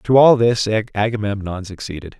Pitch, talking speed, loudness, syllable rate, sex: 105 Hz, 135 wpm, -17 LUFS, 4.7 syllables/s, male